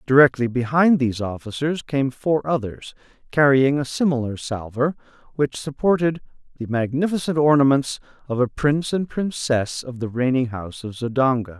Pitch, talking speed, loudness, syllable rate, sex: 135 Hz, 140 wpm, -21 LUFS, 5.1 syllables/s, male